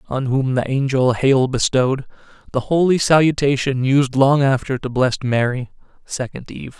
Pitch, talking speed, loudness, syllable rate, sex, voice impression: 135 Hz, 150 wpm, -18 LUFS, 4.8 syllables/s, male, masculine, middle-aged, thick, relaxed, weak, bright, slightly clear, fluent, raspy, cool, very intellectual, slightly refreshing, sincere, very calm, mature, very friendly, very reassuring, unique, very elegant, very sweet, very kind, very strict, modest